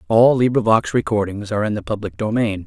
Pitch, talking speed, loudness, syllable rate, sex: 110 Hz, 180 wpm, -18 LUFS, 6.1 syllables/s, male